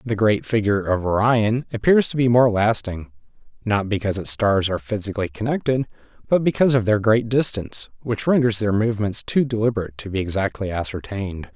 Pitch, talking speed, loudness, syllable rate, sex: 110 Hz, 170 wpm, -20 LUFS, 6.0 syllables/s, male